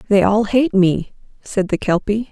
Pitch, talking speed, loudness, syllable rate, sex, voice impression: 205 Hz, 180 wpm, -17 LUFS, 4.4 syllables/s, female, feminine, adult-like, tensed, powerful, slightly dark, clear, fluent, intellectual, calm, slightly friendly, elegant, slightly lively